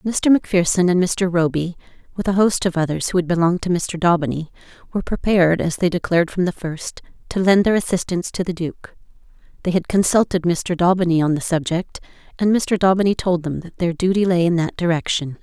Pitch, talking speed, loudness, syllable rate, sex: 175 Hz, 200 wpm, -19 LUFS, 5.8 syllables/s, female